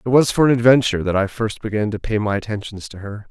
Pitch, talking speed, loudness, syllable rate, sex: 110 Hz, 275 wpm, -18 LUFS, 6.5 syllables/s, male